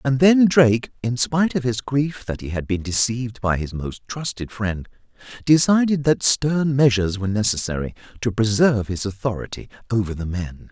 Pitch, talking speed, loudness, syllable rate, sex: 115 Hz, 175 wpm, -20 LUFS, 5.3 syllables/s, male